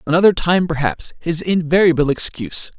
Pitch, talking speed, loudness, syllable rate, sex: 160 Hz, 110 wpm, -17 LUFS, 5.5 syllables/s, male